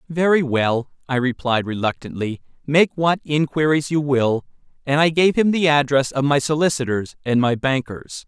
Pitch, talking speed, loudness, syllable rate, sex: 140 Hz, 160 wpm, -19 LUFS, 4.7 syllables/s, male